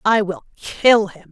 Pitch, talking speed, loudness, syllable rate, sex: 195 Hz, 185 wpm, -17 LUFS, 3.6 syllables/s, female